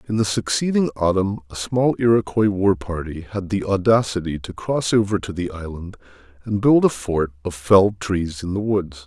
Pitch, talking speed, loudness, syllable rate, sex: 95 Hz, 185 wpm, -20 LUFS, 5.0 syllables/s, male